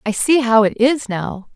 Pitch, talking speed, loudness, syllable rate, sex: 230 Hz, 230 wpm, -16 LUFS, 4.3 syllables/s, female